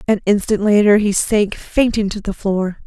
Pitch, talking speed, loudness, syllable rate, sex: 205 Hz, 190 wpm, -16 LUFS, 4.6 syllables/s, female